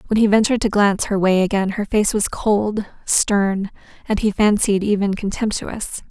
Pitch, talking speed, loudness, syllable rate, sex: 205 Hz, 175 wpm, -18 LUFS, 4.9 syllables/s, female